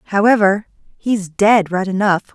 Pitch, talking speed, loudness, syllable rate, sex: 200 Hz, 130 wpm, -16 LUFS, 4.7 syllables/s, female